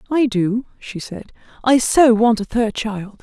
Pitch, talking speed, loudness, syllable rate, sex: 225 Hz, 185 wpm, -17 LUFS, 4.0 syllables/s, female